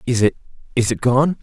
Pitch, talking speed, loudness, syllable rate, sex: 125 Hz, 170 wpm, -19 LUFS, 5.9 syllables/s, male